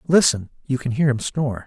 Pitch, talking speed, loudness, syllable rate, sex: 135 Hz, 180 wpm, -21 LUFS, 5.9 syllables/s, male